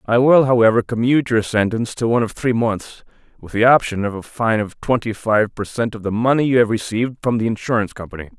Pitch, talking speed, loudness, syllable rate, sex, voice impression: 115 Hz, 230 wpm, -18 LUFS, 6.3 syllables/s, male, masculine, middle-aged, tensed, powerful, slightly hard, clear, slightly raspy, cool, intellectual, mature, wild, lively, intense